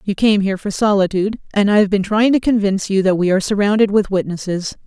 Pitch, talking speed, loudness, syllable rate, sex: 200 Hz, 235 wpm, -16 LUFS, 6.6 syllables/s, female